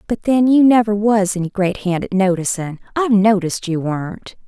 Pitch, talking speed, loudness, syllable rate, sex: 200 Hz, 190 wpm, -16 LUFS, 5.4 syllables/s, female